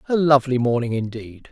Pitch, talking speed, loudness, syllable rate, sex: 125 Hz, 160 wpm, -20 LUFS, 5.9 syllables/s, male